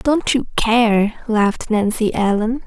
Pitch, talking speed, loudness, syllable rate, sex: 225 Hz, 135 wpm, -17 LUFS, 3.7 syllables/s, female